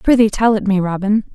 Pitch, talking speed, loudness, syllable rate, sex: 210 Hz, 225 wpm, -15 LUFS, 5.8 syllables/s, female